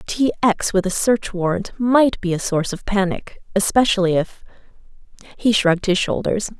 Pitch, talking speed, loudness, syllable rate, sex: 200 Hz, 155 wpm, -19 LUFS, 5.0 syllables/s, female